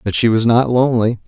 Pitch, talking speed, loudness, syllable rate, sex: 115 Hz, 235 wpm, -14 LUFS, 6.3 syllables/s, male